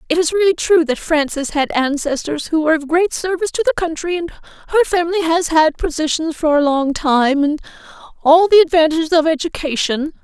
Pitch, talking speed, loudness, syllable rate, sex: 320 Hz, 190 wpm, -16 LUFS, 5.8 syllables/s, female